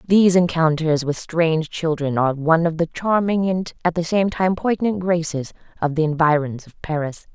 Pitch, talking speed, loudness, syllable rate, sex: 165 Hz, 180 wpm, -20 LUFS, 5.1 syllables/s, female